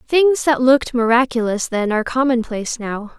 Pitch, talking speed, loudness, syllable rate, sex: 245 Hz, 150 wpm, -17 LUFS, 5.4 syllables/s, female